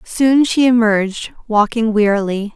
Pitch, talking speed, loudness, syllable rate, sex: 225 Hz, 120 wpm, -15 LUFS, 4.3 syllables/s, female